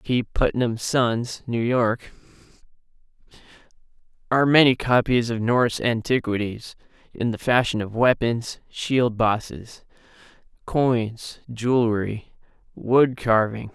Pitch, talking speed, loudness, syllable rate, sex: 120 Hz, 95 wpm, -22 LUFS, 3.8 syllables/s, male